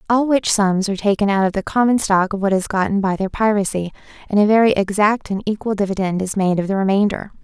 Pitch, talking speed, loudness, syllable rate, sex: 200 Hz, 235 wpm, -18 LUFS, 6.2 syllables/s, female